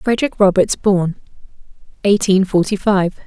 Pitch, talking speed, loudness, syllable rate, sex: 195 Hz, 110 wpm, -16 LUFS, 4.9 syllables/s, female